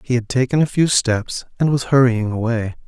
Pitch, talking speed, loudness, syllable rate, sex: 125 Hz, 210 wpm, -18 LUFS, 5.1 syllables/s, male